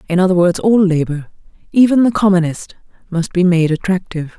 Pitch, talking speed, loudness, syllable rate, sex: 180 Hz, 165 wpm, -14 LUFS, 5.9 syllables/s, female